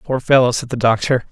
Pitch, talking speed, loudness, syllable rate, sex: 125 Hz, 230 wpm, -16 LUFS, 5.9 syllables/s, male